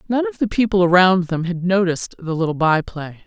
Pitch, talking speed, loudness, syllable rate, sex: 180 Hz, 220 wpm, -18 LUFS, 5.7 syllables/s, female